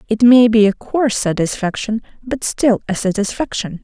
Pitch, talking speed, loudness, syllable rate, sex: 220 Hz, 155 wpm, -16 LUFS, 5.0 syllables/s, female